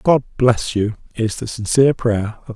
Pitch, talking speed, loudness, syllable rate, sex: 115 Hz, 190 wpm, -18 LUFS, 4.8 syllables/s, male